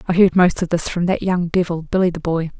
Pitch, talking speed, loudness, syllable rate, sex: 175 Hz, 275 wpm, -18 LUFS, 5.9 syllables/s, female